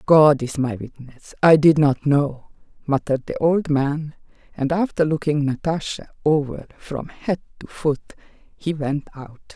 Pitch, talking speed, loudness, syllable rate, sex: 145 Hz, 150 wpm, -21 LUFS, 4.2 syllables/s, female